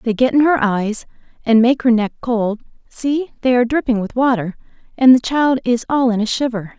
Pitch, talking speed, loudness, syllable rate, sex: 240 Hz, 210 wpm, -16 LUFS, 5.3 syllables/s, female